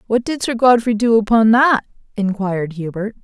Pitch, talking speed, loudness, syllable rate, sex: 220 Hz, 165 wpm, -16 LUFS, 5.1 syllables/s, female